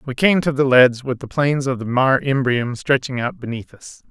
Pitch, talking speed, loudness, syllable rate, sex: 130 Hz, 235 wpm, -18 LUFS, 5.1 syllables/s, male